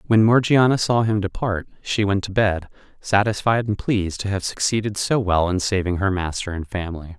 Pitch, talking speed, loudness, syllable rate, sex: 100 Hz, 190 wpm, -21 LUFS, 5.3 syllables/s, male